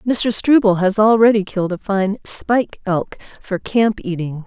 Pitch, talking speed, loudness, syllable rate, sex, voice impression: 205 Hz, 160 wpm, -17 LUFS, 4.5 syllables/s, female, very feminine, slightly young, slightly adult-like, very thin, slightly relaxed, slightly weak, slightly bright, slightly hard, clear, fluent, very cute, intellectual, refreshing, very sincere, very calm, very friendly, very reassuring, unique, very elegant, sweet, slightly lively, kind, slightly intense, slightly sharp, slightly modest, slightly light